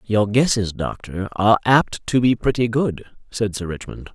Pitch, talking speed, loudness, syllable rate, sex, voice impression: 110 Hz, 175 wpm, -20 LUFS, 4.7 syllables/s, male, masculine, middle-aged, tensed, powerful, hard, fluent, mature, wild, lively, strict, intense